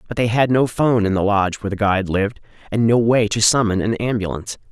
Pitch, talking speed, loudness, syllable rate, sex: 110 Hz, 240 wpm, -18 LUFS, 6.8 syllables/s, male